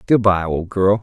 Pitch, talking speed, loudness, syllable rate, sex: 100 Hz, 175 wpm, -17 LUFS, 4.5 syllables/s, male